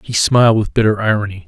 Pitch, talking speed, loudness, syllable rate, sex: 105 Hz, 205 wpm, -14 LUFS, 6.6 syllables/s, male